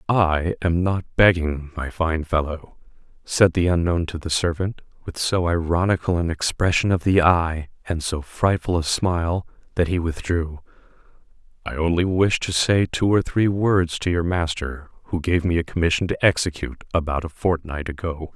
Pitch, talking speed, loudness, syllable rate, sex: 85 Hz, 170 wpm, -22 LUFS, 4.8 syllables/s, male